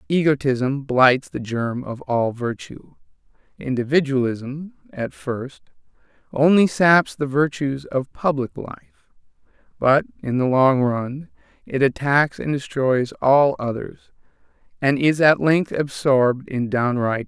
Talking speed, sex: 125 wpm, male